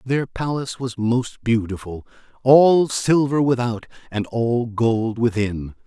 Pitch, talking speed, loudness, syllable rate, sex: 120 Hz, 125 wpm, -20 LUFS, 3.9 syllables/s, male